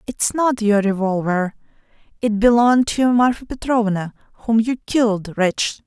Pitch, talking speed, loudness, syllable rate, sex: 220 Hz, 135 wpm, -18 LUFS, 4.6 syllables/s, female